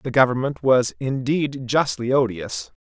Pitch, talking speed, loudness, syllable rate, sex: 125 Hz, 125 wpm, -21 LUFS, 4.1 syllables/s, male